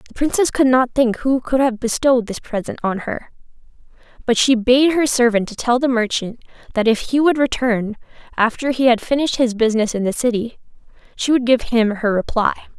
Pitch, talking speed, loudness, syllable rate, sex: 240 Hz, 195 wpm, -18 LUFS, 5.6 syllables/s, female